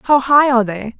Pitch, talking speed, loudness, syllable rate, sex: 250 Hz, 240 wpm, -13 LUFS, 5.3 syllables/s, female